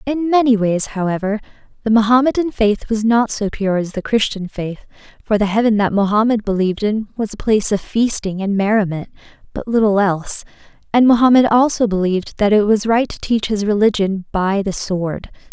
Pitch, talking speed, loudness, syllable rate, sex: 215 Hz, 180 wpm, -17 LUFS, 5.4 syllables/s, female